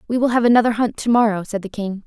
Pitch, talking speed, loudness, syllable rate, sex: 220 Hz, 290 wpm, -18 LUFS, 6.9 syllables/s, female